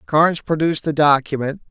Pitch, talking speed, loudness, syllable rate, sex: 150 Hz, 140 wpm, -18 LUFS, 6.0 syllables/s, male